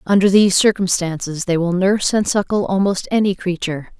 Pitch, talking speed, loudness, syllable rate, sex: 190 Hz, 165 wpm, -17 LUFS, 5.8 syllables/s, female